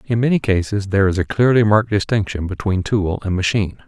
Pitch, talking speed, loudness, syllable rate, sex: 100 Hz, 200 wpm, -18 LUFS, 6.3 syllables/s, male